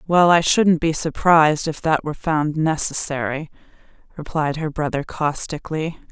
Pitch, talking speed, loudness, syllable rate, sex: 155 Hz, 135 wpm, -19 LUFS, 4.8 syllables/s, female